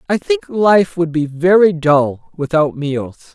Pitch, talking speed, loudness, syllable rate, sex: 165 Hz, 160 wpm, -15 LUFS, 3.6 syllables/s, male